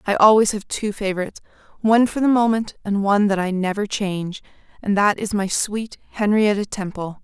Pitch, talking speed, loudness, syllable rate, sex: 205 Hz, 180 wpm, -20 LUFS, 5.6 syllables/s, female